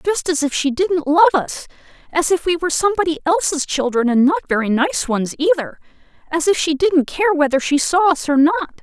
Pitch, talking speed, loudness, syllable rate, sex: 320 Hz, 195 wpm, -17 LUFS, 5.4 syllables/s, female